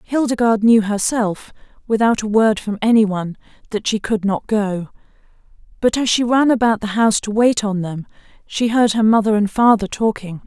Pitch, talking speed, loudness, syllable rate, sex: 215 Hz, 185 wpm, -17 LUFS, 5.3 syllables/s, female